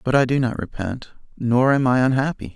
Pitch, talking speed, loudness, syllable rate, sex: 125 Hz, 210 wpm, -20 LUFS, 5.5 syllables/s, male